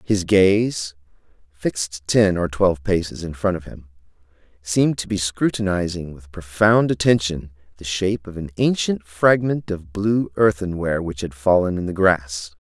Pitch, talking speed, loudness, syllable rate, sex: 90 Hz, 155 wpm, -20 LUFS, 4.6 syllables/s, male